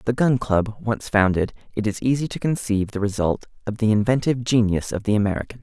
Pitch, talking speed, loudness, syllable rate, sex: 110 Hz, 205 wpm, -22 LUFS, 6.1 syllables/s, male